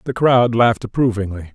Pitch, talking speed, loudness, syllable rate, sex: 115 Hz, 155 wpm, -17 LUFS, 6.0 syllables/s, male